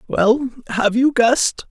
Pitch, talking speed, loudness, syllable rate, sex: 240 Hz, 140 wpm, -17 LUFS, 3.9 syllables/s, male